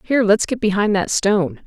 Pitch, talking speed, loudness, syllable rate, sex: 210 Hz, 215 wpm, -17 LUFS, 5.8 syllables/s, female